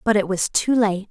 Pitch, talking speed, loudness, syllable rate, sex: 205 Hz, 270 wpm, -20 LUFS, 5.0 syllables/s, female